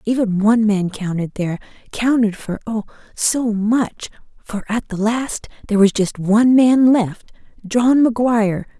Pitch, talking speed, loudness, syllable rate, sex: 220 Hz, 130 wpm, -17 LUFS, 4.8 syllables/s, female